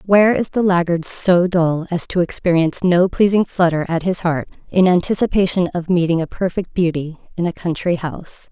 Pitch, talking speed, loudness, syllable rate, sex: 175 Hz, 185 wpm, -17 LUFS, 5.2 syllables/s, female